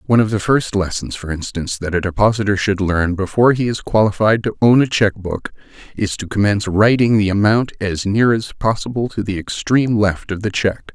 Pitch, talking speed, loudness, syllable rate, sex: 105 Hz, 210 wpm, -17 LUFS, 5.6 syllables/s, male